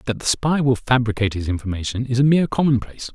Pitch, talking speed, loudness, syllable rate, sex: 120 Hz, 210 wpm, -20 LUFS, 7.0 syllables/s, male